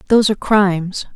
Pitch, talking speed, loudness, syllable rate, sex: 200 Hz, 155 wpm, -16 LUFS, 6.7 syllables/s, female